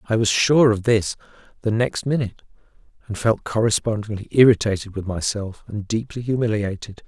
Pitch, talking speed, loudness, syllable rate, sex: 110 Hz, 145 wpm, -21 LUFS, 5.4 syllables/s, male